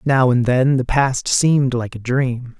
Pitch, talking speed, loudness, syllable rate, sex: 130 Hz, 210 wpm, -17 LUFS, 4.0 syllables/s, male